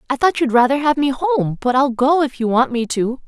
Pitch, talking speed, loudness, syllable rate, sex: 265 Hz, 275 wpm, -17 LUFS, 5.3 syllables/s, female